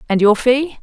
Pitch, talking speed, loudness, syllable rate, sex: 240 Hz, 215 wpm, -14 LUFS, 4.7 syllables/s, female